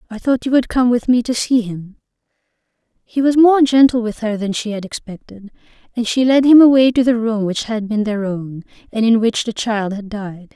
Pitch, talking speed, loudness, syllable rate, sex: 225 Hz, 225 wpm, -15 LUFS, 5.1 syllables/s, female